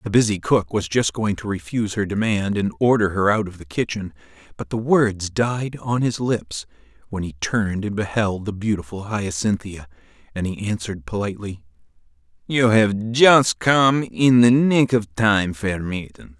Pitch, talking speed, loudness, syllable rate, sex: 105 Hz, 170 wpm, -20 LUFS, 4.6 syllables/s, male